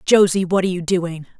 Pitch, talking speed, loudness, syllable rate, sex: 180 Hz, 215 wpm, -18 LUFS, 5.9 syllables/s, female